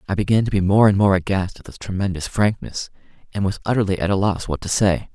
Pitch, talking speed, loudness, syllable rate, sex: 100 Hz, 245 wpm, -20 LUFS, 6.3 syllables/s, male